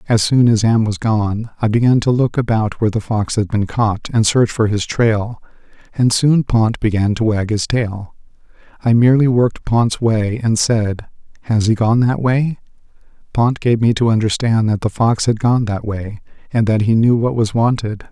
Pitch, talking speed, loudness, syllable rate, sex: 115 Hz, 200 wpm, -16 LUFS, 4.7 syllables/s, male